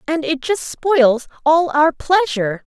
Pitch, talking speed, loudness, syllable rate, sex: 305 Hz, 155 wpm, -17 LUFS, 3.8 syllables/s, female